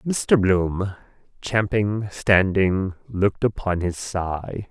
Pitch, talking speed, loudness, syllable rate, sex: 100 Hz, 100 wpm, -22 LUFS, 3.0 syllables/s, male